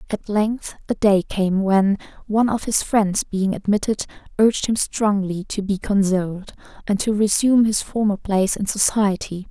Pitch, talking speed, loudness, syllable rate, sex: 205 Hz, 165 wpm, -20 LUFS, 4.8 syllables/s, female